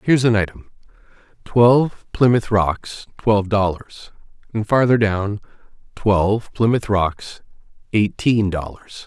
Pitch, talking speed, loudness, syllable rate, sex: 105 Hz, 105 wpm, -18 LUFS, 4.1 syllables/s, male